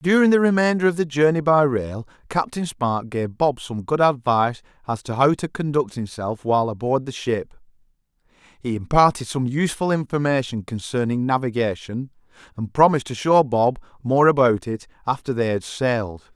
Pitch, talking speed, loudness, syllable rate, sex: 135 Hz, 160 wpm, -21 LUFS, 5.2 syllables/s, male